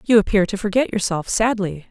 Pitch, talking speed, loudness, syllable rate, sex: 205 Hz, 190 wpm, -19 LUFS, 5.5 syllables/s, female